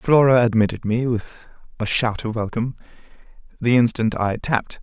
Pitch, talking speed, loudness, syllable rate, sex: 115 Hz, 150 wpm, -20 LUFS, 5.5 syllables/s, male